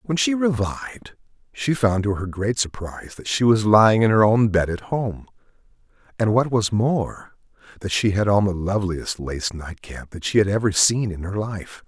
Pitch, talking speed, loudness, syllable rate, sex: 105 Hz, 200 wpm, -21 LUFS, 4.8 syllables/s, male